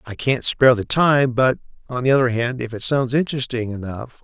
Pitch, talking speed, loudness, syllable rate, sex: 125 Hz, 210 wpm, -19 LUFS, 5.5 syllables/s, male